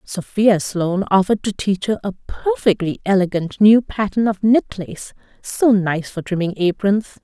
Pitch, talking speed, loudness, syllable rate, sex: 200 Hz, 160 wpm, -18 LUFS, 4.6 syllables/s, female